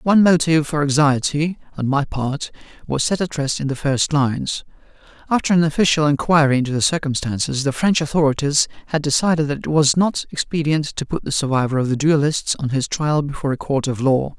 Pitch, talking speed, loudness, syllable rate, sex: 145 Hz, 190 wpm, -19 LUFS, 5.8 syllables/s, male